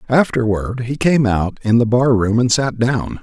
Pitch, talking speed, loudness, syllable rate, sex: 120 Hz, 205 wpm, -16 LUFS, 4.3 syllables/s, male